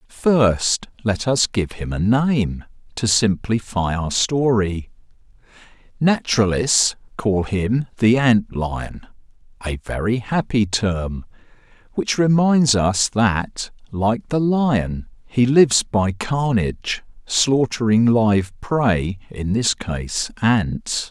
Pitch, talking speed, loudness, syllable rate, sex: 110 Hz, 115 wpm, -19 LUFS, 3.2 syllables/s, male